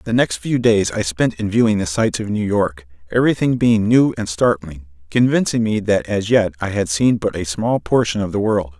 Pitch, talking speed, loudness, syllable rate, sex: 100 Hz, 225 wpm, -18 LUFS, 5.1 syllables/s, male